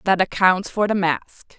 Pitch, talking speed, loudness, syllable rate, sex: 190 Hz, 190 wpm, -19 LUFS, 5.3 syllables/s, female